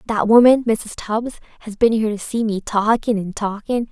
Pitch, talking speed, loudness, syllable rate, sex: 220 Hz, 200 wpm, -18 LUFS, 5.1 syllables/s, female